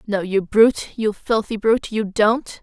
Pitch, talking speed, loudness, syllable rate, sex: 215 Hz, 185 wpm, -19 LUFS, 4.8 syllables/s, female